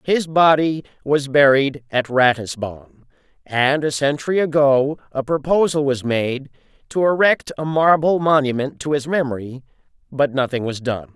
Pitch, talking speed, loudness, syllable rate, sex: 140 Hz, 140 wpm, -18 LUFS, 4.6 syllables/s, male